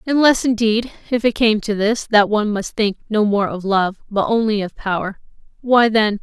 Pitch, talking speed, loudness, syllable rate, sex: 215 Hz, 175 wpm, -17 LUFS, 4.9 syllables/s, female